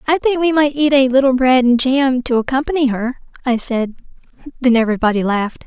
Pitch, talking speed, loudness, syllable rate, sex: 260 Hz, 190 wpm, -15 LUFS, 5.9 syllables/s, female